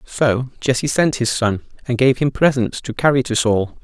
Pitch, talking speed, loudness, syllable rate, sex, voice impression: 125 Hz, 205 wpm, -18 LUFS, 4.7 syllables/s, male, masculine, middle-aged, tensed, slightly powerful, clear, slightly halting, slightly raspy, intellectual, slightly calm, friendly, unique, lively, slightly kind